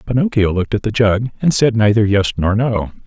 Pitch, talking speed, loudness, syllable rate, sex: 110 Hz, 215 wpm, -15 LUFS, 5.6 syllables/s, male